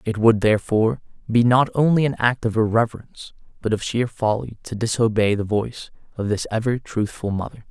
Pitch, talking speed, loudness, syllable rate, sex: 115 Hz, 180 wpm, -21 LUFS, 5.7 syllables/s, male